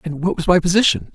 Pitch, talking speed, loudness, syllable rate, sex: 175 Hz, 260 wpm, -17 LUFS, 6.7 syllables/s, male